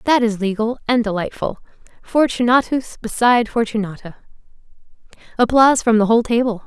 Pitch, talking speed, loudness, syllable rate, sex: 230 Hz, 110 wpm, -17 LUFS, 5.8 syllables/s, female